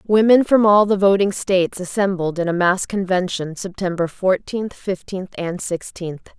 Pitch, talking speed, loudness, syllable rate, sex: 190 Hz, 150 wpm, -19 LUFS, 4.6 syllables/s, female